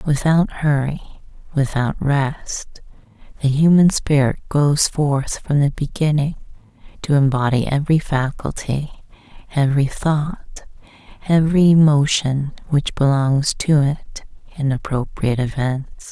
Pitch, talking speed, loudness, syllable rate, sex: 145 Hz, 100 wpm, -18 LUFS, 4.1 syllables/s, female